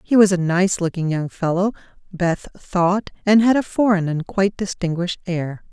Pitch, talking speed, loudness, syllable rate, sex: 185 Hz, 180 wpm, -20 LUFS, 4.9 syllables/s, female